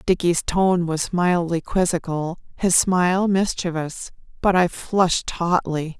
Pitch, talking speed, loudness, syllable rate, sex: 175 Hz, 120 wpm, -21 LUFS, 3.9 syllables/s, female